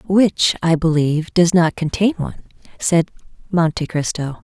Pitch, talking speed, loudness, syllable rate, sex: 170 Hz, 135 wpm, -18 LUFS, 4.5 syllables/s, female